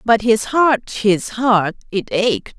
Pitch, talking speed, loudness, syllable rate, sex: 220 Hz, 165 wpm, -17 LUFS, 3.2 syllables/s, female